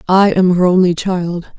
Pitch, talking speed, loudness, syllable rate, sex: 180 Hz, 190 wpm, -13 LUFS, 4.6 syllables/s, female